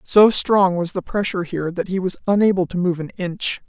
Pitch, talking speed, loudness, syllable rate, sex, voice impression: 185 Hz, 230 wpm, -19 LUFS, 5.6 syllables/s, female, slightly masculine, slightly feminine, very gender-neutral, adult-like, slightly middle-aged, slightly thick, tensed, slightly weak, slightly bright, slightly hard, clear, slightly fluent, slightly raspy, slightly intellectual, slightly refreshing, sincere, slightly calm, slightly friendly, slightly reassuring, very unique, slightly wild, lively, slightly strict, intense, sharp, light